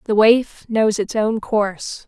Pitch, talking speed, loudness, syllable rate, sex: 215 Hz, 175 wpm, -18 LUFS, 3.7 syllables/s, female